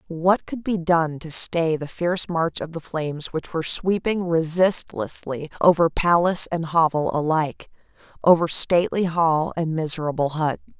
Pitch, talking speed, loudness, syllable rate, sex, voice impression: 165 Hz, 150 wpm, -21 LUFS, 4.7 syllables/s, female, very feminine, very adult-like, middle-aged, thin, tensed, very powerful, bright, very hard, clear, fluent, cool, very intellectual, slightly refreshing, very sincere, calm, very reassuring, unique, elegant, slightly wild, slightly lively, strict, slightly intense, sharp